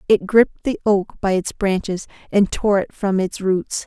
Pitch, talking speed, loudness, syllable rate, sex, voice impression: 195 Hz, 200 wpm, -19 LUFS, 4.4 syllables/s, female, very feminine, very adult-like, slightly middle-aged, slightly thin, relaxed, weak, dark, slightly soft, slightly muffled, fluent, very cute, intellectual, refreshing, very sincere, very calm, very friendly, very reassuring, very unique, very elegant, slightly wild, very sweet, slightly lively, very kind, very modest